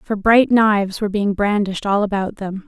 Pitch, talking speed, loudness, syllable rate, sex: 205 Hz, 200 wpm, -17 LUFS, 5.3 syllables/s, female